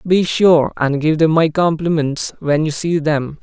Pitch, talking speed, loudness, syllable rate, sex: 160 Hz, 195 wpm, -16 LUFS, 4.0 syllables/s, male